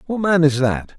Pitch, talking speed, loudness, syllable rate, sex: 150 Hz, 245 wpm, -17 LUFS, 5.1 syllables/s, male